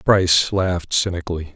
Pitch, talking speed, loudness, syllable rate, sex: 90 Hz, 115 wpm, -19 LUFS, 5.5 syllables/s, male